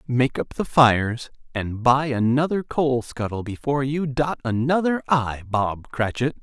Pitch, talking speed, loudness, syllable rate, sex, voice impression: 130 Hz, 150 wpm, -22 LUFS, 4.3 syllables/s, male, very masculine, adult-like, middle-aged, thick, slightly relaxed, slightly weak, very bright, soft, very clear, fluent, cool, very intellectual, slightly refreshing, sincere, calm, very mature, friendly, very reassuring, unique, elegant, slightly wild, very sweet, slightly lively, very kind, modest